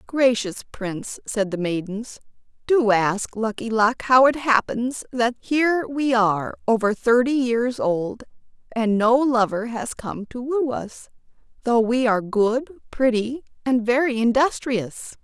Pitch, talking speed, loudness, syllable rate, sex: 235 Hz, 140 wpm, -21 LUFS, 4.0 syllables/s, female